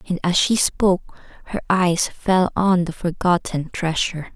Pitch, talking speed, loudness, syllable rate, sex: 180 Hz, 150 wpm, -20 LUFS, 4.5 syllables/s, female